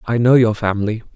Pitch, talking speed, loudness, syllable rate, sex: 110 Hz, 210 wpm, -16 LUFS, 6.3 syllables/s, male